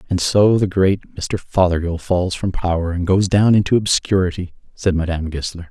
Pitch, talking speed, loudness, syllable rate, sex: 90 Hz, 180 wpm, -18 LUFS, 5.2 syllables/s, male